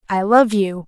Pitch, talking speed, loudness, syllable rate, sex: 205 Hz, 205 wpm, -16 LUFS, 4.4 syllables/s, female